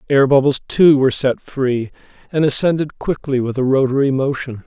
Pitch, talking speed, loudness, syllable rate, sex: 135 Hz, 165 wpm, -16 LUFS, 5.3 syllables/s, male